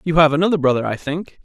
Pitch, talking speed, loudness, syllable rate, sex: 155 Hz, 250 wpm, -18 LUFS, 6.8 syllables/s, male